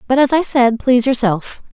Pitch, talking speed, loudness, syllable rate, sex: 250 Hz, 200 wpm, -14 LUFS, 5.3 syllables/s, female